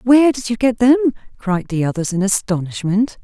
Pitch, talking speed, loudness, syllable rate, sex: 210 Hz, 185 wpm, -17 LUFS, 5.7 syllables/s, female